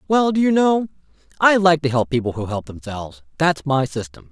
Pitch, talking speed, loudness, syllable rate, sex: 145 Hz, 195 wpm, -19 LUFS, 5.5 syllables/s, male